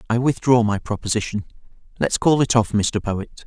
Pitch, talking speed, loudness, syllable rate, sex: 115 Hz, 175 wpm, -20 LUFS, 5.1 syllables/s, male